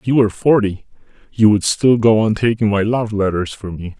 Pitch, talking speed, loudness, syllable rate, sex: 110 Hz, 225 wpm, -16 LUFS, 5.4 syllables/s, male